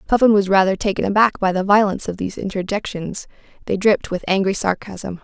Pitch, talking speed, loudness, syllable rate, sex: 195 Hz, 185 wpm, -19 LUFS, 6.4 syllables/s, female